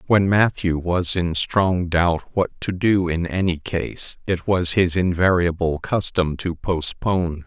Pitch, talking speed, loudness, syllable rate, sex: 90 Hz, 155 wpm, -21 LUFS, 3.7 syllables/s, male